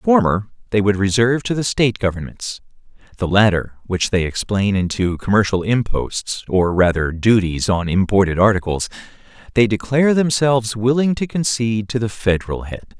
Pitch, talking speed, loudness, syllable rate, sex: 105 Hz, 150 wpm, -18 LUFS, 5.3 syllables/s, male